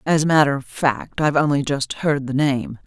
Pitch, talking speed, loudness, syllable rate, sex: 140 Hz, 230 wpm, -20 LUFS, 5.2 syllables/s, female